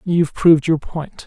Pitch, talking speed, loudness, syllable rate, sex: 160 Hz, 190 wpm, -16 LUFS, 5.1 syllables/s, male